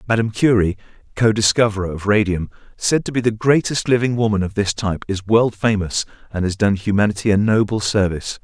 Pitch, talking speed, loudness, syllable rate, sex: 105 Hz, 185 wpm, -18 LUFS, 6.0 syllables/s, male